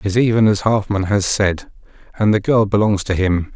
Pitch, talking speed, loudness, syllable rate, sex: 100 Hz, 220 wpm, -16 LUFS, 5.3 syllables/s, male